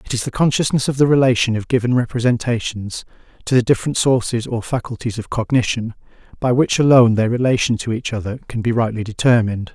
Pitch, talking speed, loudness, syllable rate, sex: 120 Hz, 185 wpm, -18 LUFS, 6.3 syllables/s, male